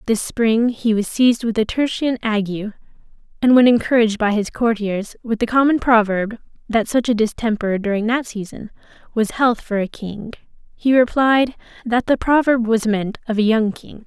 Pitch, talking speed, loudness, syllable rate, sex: 225 Hz, 180 wpm, -18 LUFS, 4.8 syllables/s, female